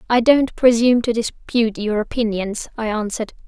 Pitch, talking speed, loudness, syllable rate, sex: 225 Hz, 155 wpm, -19 LUFS, 5.8 syllables/s, female